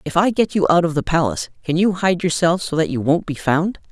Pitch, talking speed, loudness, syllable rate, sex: 170 Hz, 275 wpm, -18 LUFS, 5.9 syllables/s, female